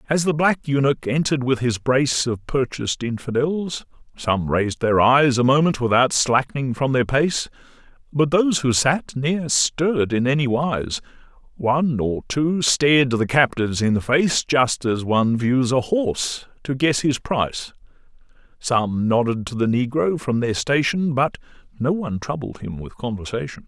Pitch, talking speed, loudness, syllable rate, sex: 130 Hz, 160 wpm, -20 LUFS, 4.7 syllables/s, male